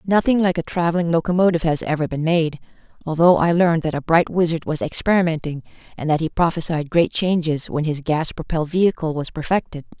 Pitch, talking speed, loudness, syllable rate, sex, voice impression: 165 Hz, 185 wpm, -20 LUFS, 6.1 syllables/s, female, feminine, middle-aged, powerful, hard, fluent, intellectual, calm, elegant, lively, slightly strict, slightly sharp